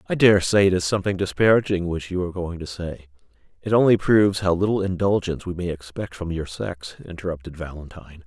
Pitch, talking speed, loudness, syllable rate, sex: 90 Hz, 195 wpm, -22 LUFS, 6.2 syllables/s, male